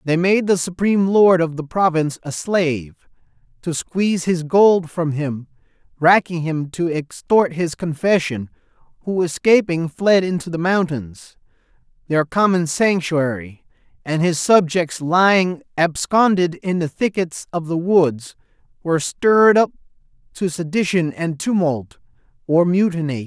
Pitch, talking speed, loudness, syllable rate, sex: 170 Hz, 130 wpm, -18 LUFS, 4.2 syllables/s, male